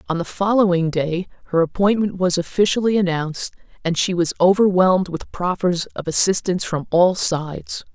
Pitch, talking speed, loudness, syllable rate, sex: 180 Hz, 150 wpm, -19 LUFS, 5.3 syllables/s, female